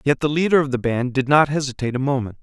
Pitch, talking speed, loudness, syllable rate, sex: 135 Hz, 270 wpm, -19 LUFS, 7.0 syllables/s, male